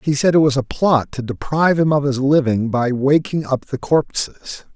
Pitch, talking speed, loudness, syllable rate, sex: 140 Hz, 215 wpm, -17 LUFS, 4.8 syllables/s, male